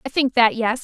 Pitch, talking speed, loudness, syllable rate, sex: 245 Hz, 290 wpm, -18 LUFS, 5.8 syllables/s, female